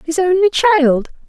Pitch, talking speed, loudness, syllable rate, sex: 335 Hz, 140 wpm, -14 LUFS, 3.8 syllables/s, female